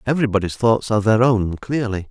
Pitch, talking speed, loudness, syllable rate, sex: 110 Hz, 170 wpm, -18 LUFS, 6.0 syllables/s, male